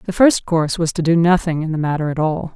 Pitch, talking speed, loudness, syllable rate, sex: 165 Hz, 280 wpm, -17 LUFS, 6.0 syllables/s, female